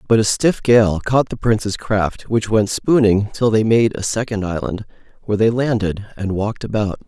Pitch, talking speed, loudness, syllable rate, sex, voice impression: 110 Hz, 195 wpm, -18 LUFS, 5.0 syllables/s, male, very masculine, very adult-like, middle-aged, very thick, tensed, powerful, slightly bright, slightly hard, slightly muffled, fluent, slightly raspy, very cool, intellectual, slightly refreshing, very sincere, very calm, very mature, very friendly, very reassuring, unique, elegant, very wild, sweet, lively, very kind, slightly modest